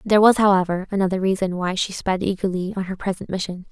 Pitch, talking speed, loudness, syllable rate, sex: 190 Hz, 210 wpm, -21 LUFS, 6.5 syllables/s, female